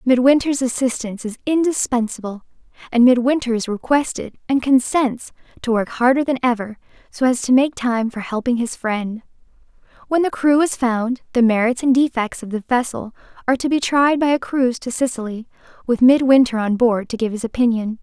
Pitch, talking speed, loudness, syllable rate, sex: 245 Hz, 175 wpm, -18 LUFS, 5.4 syllables/s, female